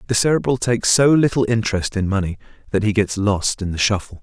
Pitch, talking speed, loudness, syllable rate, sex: 105 Hz, 215 wpm, -18 LUFS, 6.2 syllables/s, male